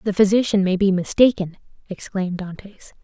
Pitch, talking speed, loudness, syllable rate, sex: 195 Hz, 140 wpm, -19 LUFS, 5.5 syllables/s, female